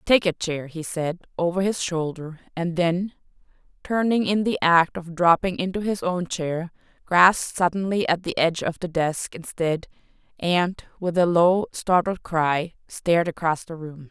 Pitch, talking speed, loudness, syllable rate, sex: 175 Hz, 160 wpm, -23 LUFS, 4.4 syllables/s, female